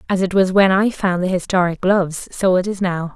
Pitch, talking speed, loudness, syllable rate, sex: 185 Hz, 245 wpm, -17 LUFS, 5.4 syllables/s, female